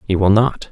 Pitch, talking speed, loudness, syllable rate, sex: 105 Hz, 255 wpm, -15 LUFS, 5.1 syllables/s, male